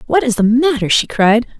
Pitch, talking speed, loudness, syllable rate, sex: 235 Hz, 225 wpm, -13 LUFS, 5.2 syllables/s, female